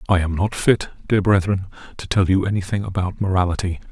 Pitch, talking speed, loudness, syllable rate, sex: 95 Hz, 185 wpm, -20 LUFS, 5.9 syllables/s, male